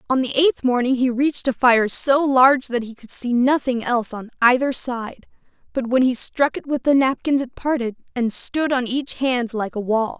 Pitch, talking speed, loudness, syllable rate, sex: 250 Hz, 220 wpm, -20 LUFS, 4.9 syllables/s, female